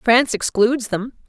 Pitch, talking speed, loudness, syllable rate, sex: 230 Hz, 140 wpm, -19 LUFS, 5.1 syllables/s, female